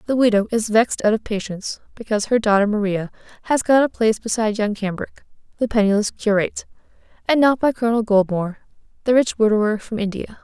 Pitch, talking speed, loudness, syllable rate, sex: 215 Hz, 180 wpm, -19 LUFS, 6.5 syllables/s, female